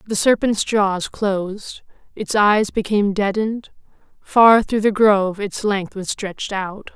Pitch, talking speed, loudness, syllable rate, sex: 205 Hz, 145 wpm, -18 LUFS, 4.2 syllables/s, female